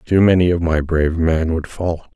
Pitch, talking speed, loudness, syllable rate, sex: 85 Hz, 225 wpm, -17 LUFS, 4.9 syllables/s, male